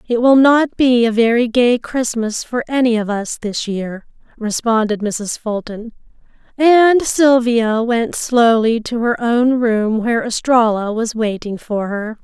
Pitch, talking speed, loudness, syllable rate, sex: 230 Hz, 150 wpm, -15 LUFS, 4.0 syllables/s, female